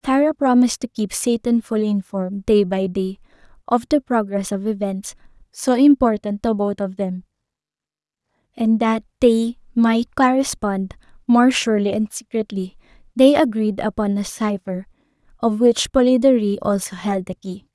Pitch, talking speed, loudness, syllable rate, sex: 215 Hz, 140 wpm, -19 LUFS, 4.8 syllables/s, female